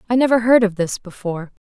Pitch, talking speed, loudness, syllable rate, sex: 215 Hz, 220 wpm, -18 LUFS, 6.7 syllables/s, female